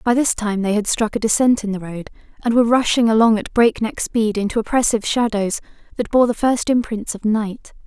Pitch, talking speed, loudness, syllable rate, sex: 220 Hz, 215 wpm, -18 LUFS, 5.6 syllables/s, female